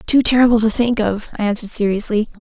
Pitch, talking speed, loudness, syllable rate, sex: 220 Hz, 200 wpm, -17 LUFS, 6.7 syllables/s, female